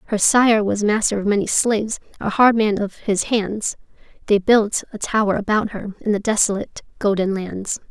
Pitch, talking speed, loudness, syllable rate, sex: 210 Hz, 180 wpm, -19 LUFS, 5.0 syllables/s, female